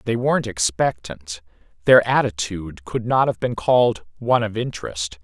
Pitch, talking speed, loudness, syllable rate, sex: 105 Hz, 150 wpm, -20 LUFS, 5.1 syllables/s, male